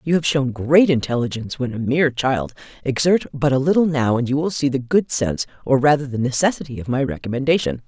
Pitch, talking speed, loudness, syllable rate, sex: 135 Hz, 215 wpm, -19 LUFS, 6.1 syllables/s, female